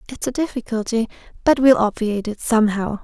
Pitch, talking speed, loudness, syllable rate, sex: 230 Hz, 140 wpm, -19 LUFS, 6.1 syllables/s, female